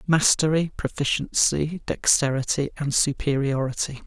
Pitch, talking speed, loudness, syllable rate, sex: 145 Hz, 75 wpm, -23 LUFS, 4.6 syllables/s, male